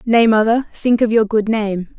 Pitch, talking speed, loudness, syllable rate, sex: 220 Hz, 210 wpm, -16 LUFS, 4.3 syllables/s, female